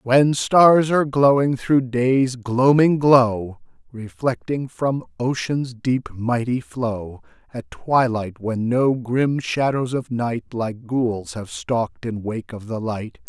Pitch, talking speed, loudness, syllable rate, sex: 125 Hz, 140 wpm, -20 LUFS, 3.3 syllables/s, male